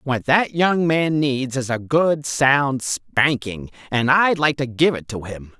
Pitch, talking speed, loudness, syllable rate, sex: 135 Hz, 195 wpm, -19 LUFS, 3.6 syllables/s, male